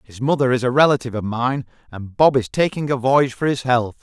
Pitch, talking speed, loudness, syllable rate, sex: 125 Hz, 240 wpm, -18 LUFS, 6.0 syllables/s, male